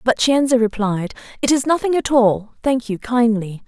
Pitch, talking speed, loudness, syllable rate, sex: 235 Hz, 180 wpm, -18 LUFS, 4.7 syllables/s, female